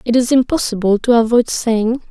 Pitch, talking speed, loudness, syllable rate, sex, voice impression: 235 Hz, 170 wpm, -15 LUFS, 5.1 syllables/s, female, very feminine, young, very thin, slightly relaxed, weak, dark, slightly soft, very clear, fluent, very cute, intellectual, very refreshing, very sincere, very calm, friendly, very reassuring, very unique, elegant, slightly wild, very sweet, slightly lively, very kind, modest